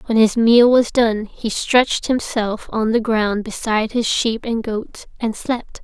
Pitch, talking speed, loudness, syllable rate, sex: 225 Hz, 185 wpm, -18 LUFS, 4.0 syllables/s, female